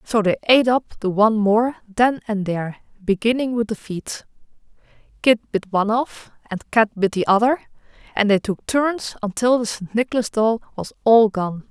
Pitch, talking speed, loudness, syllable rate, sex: 220 Hz, 180 wpm, -20 LUFS, 4.9 syllables/s, female